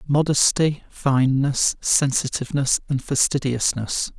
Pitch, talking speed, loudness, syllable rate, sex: 135 Hz, 70 wpm, -20 LUFS, 4.1 syllables/s, male